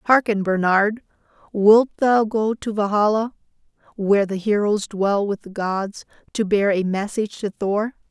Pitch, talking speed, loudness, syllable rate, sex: 205 Hz, 150 wpm, -20 LUFS, 4.5 syllables/s, female